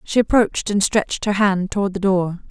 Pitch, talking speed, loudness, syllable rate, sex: 200 Hz, 215 wpm, -19 LUFS, 5.5 syllables/s, female